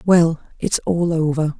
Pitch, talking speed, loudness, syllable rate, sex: 165 Hz, 150 wpm, -19 LUFS, 3.9 syllables/s, female